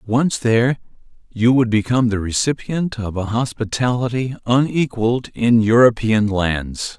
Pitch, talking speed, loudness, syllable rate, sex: 115 Hz, 120 wpm, -18 LUFS, 4.4 syllables/s, male